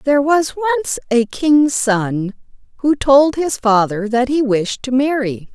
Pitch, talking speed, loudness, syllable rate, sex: 260 Hz, 160 wpm, -16 LUFS, 4.0 syllables/s, female